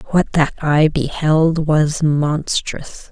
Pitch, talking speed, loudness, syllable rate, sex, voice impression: 155 Hz, 115 wpm, -16 LUFS, 2.9 syllables/s, female, feminine, adult-like, tensed, slightly hard, clear, fluent, intellectual, calm, elegant, lively, slightly sharp